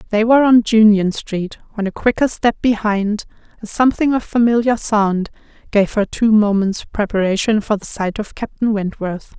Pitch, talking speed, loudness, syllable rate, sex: 215 Hz, 165 wpm, -16 LUFS, 4.9 syllables/s, female